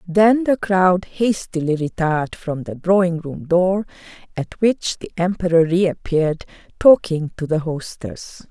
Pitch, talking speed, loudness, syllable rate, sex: 175 Hz, 135 wpm, -19 LUFS, 4.0 syllables/s, female